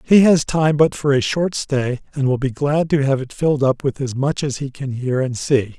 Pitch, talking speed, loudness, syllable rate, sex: 140 Hz, 270 wpm, -19 LUFS, 4.9 syllables/s, male